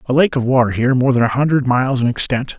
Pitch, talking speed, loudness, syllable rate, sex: 130 Hz, 280 wpm, -15 LUFS, 6.9 syllables/s, male